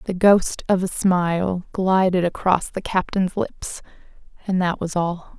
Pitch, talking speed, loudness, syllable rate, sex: 185 Hz, 155 wpm, -21 LUFS, 4.1 syllables/s, female